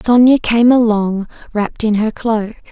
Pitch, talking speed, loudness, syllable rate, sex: 220 Hz, 155 wpm, -14 LUFS, 4.5 syllables/s, female